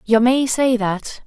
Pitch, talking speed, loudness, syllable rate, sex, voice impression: 235 Hz, 190 wpm, -18 LUFS, 3.5 syllables/s, female, feminine, slightly adult-like, slightly dark, calm, slightly unique